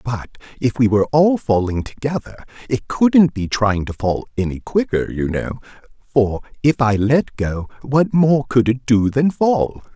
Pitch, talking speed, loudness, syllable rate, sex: 120 Hz, 175 wpm, -18 LUFS, 4.3 syllables/s, male